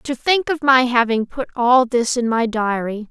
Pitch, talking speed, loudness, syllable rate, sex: 245 Hz, 215 wpm, -17 LUFS, 4.3 syllables/s, female